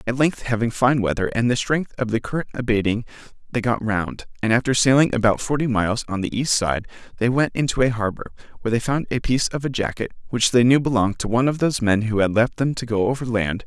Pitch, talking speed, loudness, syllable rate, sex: 120 Hz, 240 wpm, -21 LUFS, 6.4 syllables/s, male